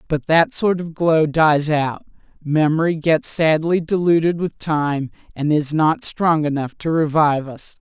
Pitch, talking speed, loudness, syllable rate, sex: 160 Hz, 160 wpm, -18 LUFS, 4.2 syllables/s, female